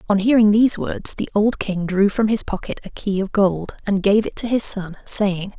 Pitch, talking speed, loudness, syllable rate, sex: 205 Hz, 235 wpm, -19 LUFS, 4.9 syllables/s, female